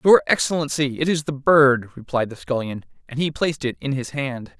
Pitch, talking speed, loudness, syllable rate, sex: 140 Hz, 210 wpm, -21 LUFS, 5.3 syllables/s, male